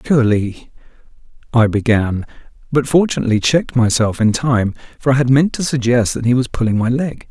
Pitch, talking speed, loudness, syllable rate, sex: 125 Hz, 175 wpm, -16 LUFS, 5.6 syllables/s, male